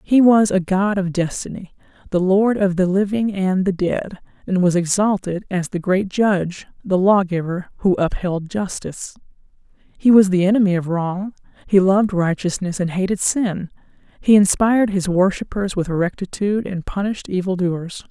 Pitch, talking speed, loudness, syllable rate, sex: 190 Hz, 155 wpm, -19 LUFS, 4.9 syllables/s, female